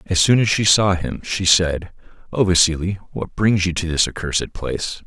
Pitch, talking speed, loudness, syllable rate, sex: 90 Hz, 200 wpm, -18 LUFS, 4.9 syllables/s, male